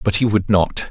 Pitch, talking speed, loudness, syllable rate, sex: 100 Hz, 265 wpm, -17 LUFS, 4.9 syllables/s, male